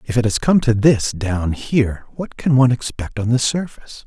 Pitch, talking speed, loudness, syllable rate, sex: 120 Hz, 220 wpm, -18 LUFS, 5.2 syllables/s, male